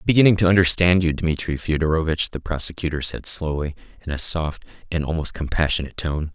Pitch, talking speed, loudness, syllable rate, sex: 80 Hz, 180 wpm, -21 LUFS, 6.3 syllables/s, male